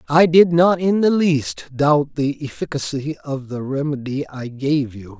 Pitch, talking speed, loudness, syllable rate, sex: 145 Hz, 175 wpm, -19 LUFS, 4.1 syllables/s, male